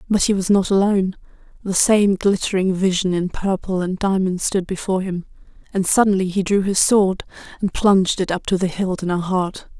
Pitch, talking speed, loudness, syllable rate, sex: 190 Hz, 195 wpm, -19 LUFS, 5.3 syllables/s, female